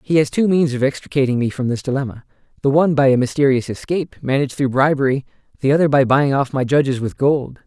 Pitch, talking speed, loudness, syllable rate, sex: 135 Hz, 210 wpm, -17 LUFS, 6.5 syllables/s, male